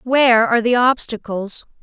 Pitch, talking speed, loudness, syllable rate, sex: 235 Hz, 130 wpm, -16 LUFS, 5.1 syllables/s, female